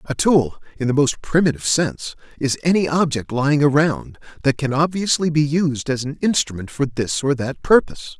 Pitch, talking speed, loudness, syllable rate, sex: 145 Hz, 185 wpm, -19 LUFS, 5.3 syllables/s, male